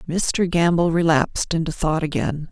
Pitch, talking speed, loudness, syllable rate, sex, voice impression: 160 Hz, 145 wpm, -20 LUFS, 4.7 syllables/s, female, very feminine, middle-aged, slightly thin, slightly tensed, powerful, dark, slightly soft, clear, fluent, cool, intellectual, refreshing, very sincere, very calm, very friendly, very reassuring, very unique, very elegant, wild, sweet, strict, slightly sharp